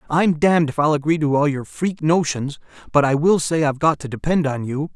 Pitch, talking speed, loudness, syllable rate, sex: 150 Hz, 240 wpm, -19 LUFS, 5.7 syllables/s, male